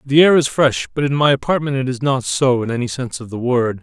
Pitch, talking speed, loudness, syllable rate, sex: 130 Hz, 280 wpm, -17 LUFS, 5.9 syllables/s, male